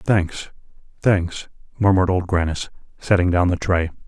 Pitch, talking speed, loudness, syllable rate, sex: 90 Hz, 130 wpm, -20 LUFS, 4.5 syllables/s, male